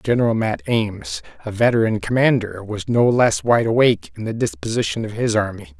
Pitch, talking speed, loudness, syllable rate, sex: 115 Hz, 175 wpm, -19 LUFS, 5.4 syllables/s, male